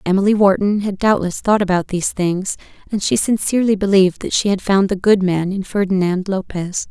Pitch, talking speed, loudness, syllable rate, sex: 195 Hz, 190 wpm, -17 LUFS, 5.6 syllables/s, female